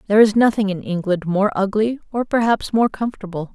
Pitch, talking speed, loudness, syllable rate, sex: 210 Hz, 185 wpm, -19 LUFS, 6.0 syllables/s, female